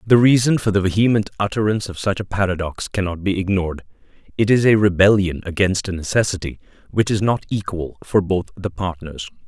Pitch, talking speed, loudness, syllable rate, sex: 95 Hz, 175 wpm, -19 LUFS, 5.9 syllables/s, male